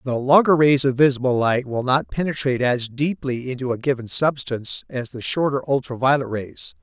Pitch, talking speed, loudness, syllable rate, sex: 130 Hz, 185 wpm, -20 LUFS, 5.4 syllables/s, male